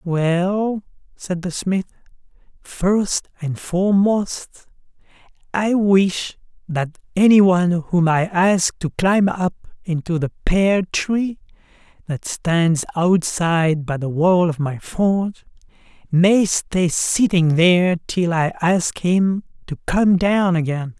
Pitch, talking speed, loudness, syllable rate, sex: 180 Hz, 125 wpm, -18 LUFS, 3.4 syllables/s, male